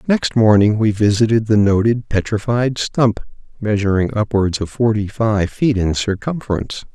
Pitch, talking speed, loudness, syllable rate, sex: 110 Hz, 140 wpm, -17 LUFS, 4.8 syllables/s, male